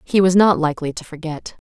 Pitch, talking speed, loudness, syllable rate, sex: 170 Hz, 215 wpm, -18 LUFS, 6.0 syllables/s, female